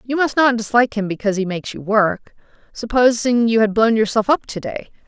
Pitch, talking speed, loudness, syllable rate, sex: 225 Hz, 215 wpm, -17 LUFS, 5.9 syllables/s, female